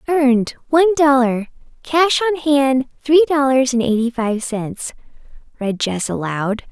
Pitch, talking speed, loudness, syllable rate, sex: 265 Hz, 135 wpm, -17 LUFS, 4.4 syllables/s, female